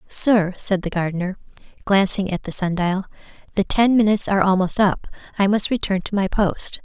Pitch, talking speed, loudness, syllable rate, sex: 195 Hz, 185 wpm, -20 LUFS, 5.4 syllables/s, female